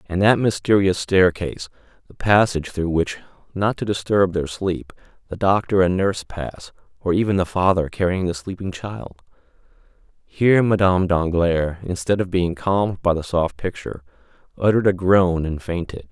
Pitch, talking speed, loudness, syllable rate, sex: 90 Hz, 155 wpm, -20 LUFS, 5.1 syllables/s, male